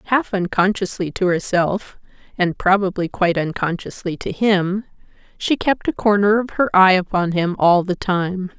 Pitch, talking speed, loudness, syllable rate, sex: 190 Hz, 140 wpm, -18 LUFS, 4.6 syllables/s, female